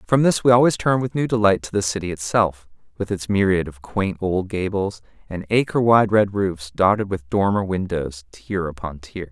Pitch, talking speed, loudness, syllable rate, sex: 95 Hz, 200 wpm, -20 LUFS, 5.1 syllables/s, male